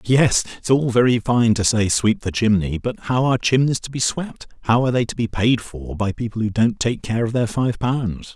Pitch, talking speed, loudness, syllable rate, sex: 115 Hz, 230 wpm, -19 LUFS, 5.1 syllables/s, male